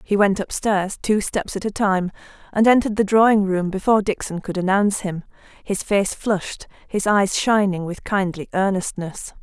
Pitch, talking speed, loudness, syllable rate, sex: 195 Hz, 165 wpm, -20 LUFS, 5.0 syllables/s, female